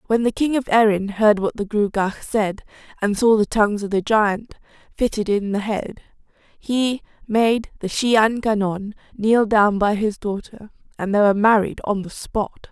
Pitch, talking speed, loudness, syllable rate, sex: 210 Hz, 185 wpm, -20 LUFS, 4.5 syllables/s, female